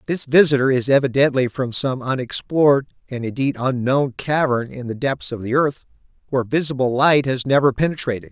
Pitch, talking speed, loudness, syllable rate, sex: 130 Hz, 165 wpm, -19 LUFS, 5.5 syllables/s, male